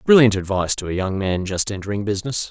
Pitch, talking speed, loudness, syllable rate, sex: 100 Hz, 215 wpm, -20 LUFS, 6.7 syllables/s, male